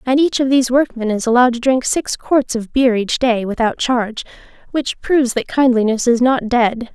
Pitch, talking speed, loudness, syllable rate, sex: 245 Hz, 205 wpm, -16 LUFS, 5.2 syllables/s, female